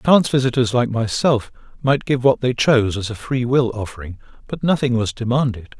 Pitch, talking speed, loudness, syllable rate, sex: 120 Hz, 185 wpm, -19 LUFS, 5.6 syllables/s, male